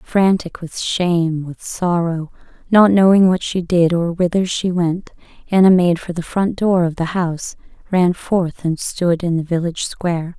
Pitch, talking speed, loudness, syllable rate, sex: 175 Hz, 180 wpm, -17 LUFS, 4.4 syllables/s, female